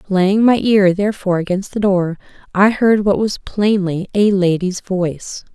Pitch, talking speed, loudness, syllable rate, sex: 195 Hz, 160 wpm, -16 LUFS, 4.5 syllables/s, female